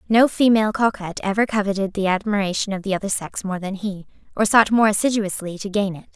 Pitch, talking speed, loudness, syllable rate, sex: 200 Hz, 205 wpm, -20 LUFS, 6.2 syllables/s, female